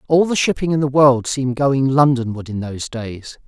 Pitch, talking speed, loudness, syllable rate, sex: 135 Hz, 205 wpm, -17 LUFS, 5.2 syllables/s, male